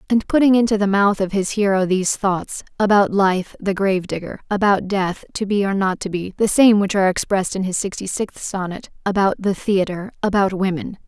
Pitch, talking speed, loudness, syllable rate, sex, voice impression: 195 Hz, 195 wpm, -19 LUFS, 4.9 syllables/s, female, feminine, slightly young, slightly adult-like, thin, tensed, powerful, bright, slightly hard, very clear, fluent, cute, intellectual, very refreshing, sincere, very calm, friendly, reassuring, slightly unique, elegant, sweet, slightly lively, kind